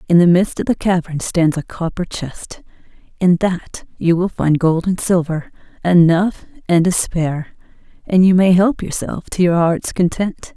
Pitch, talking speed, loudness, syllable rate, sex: 175 Hz, 175 wpm, -16 LUFS, 4.4 syllables/s, female